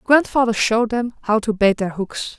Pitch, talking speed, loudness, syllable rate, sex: 225 Hz, 200 wpm, -19 LUFS, 5.0 syllables/s, female